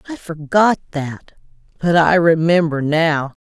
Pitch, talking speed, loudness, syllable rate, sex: 165 Hz, 120 wpm, -16 LUFS, 3.9 syllables/s, female